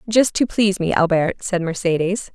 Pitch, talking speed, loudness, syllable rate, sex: 190 Hz, 180 wpm, -19 LUFS, 5.1 syllables/s, female